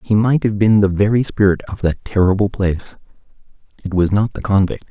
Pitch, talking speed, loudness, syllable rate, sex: 100 Hz, 195 wpm, -16 LUFS, 5.6 syllables/s, male